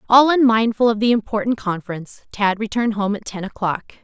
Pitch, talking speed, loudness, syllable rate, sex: 215 Hz, 180 wpm, -19 LUFS, 6.1 syllables/s, female